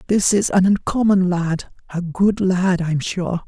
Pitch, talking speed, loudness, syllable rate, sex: 185 Hz, 175 wpm, -18 LUFS, 4.0 syllables/s, male